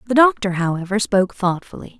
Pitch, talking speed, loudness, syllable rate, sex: 205 Hz, 150 wpm, -19 LUFS, 6.2 syllables/s, female